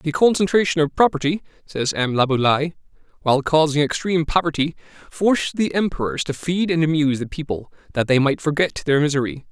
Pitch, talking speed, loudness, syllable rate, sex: 155 Hz, 165 wpm, -20 LUFS, 5.9 syllables/s, male